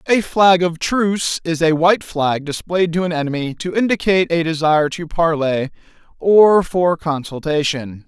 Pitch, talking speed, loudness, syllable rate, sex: 165 Hz, 155 wpm, -17 LUFS, 4.8 syllables/s, male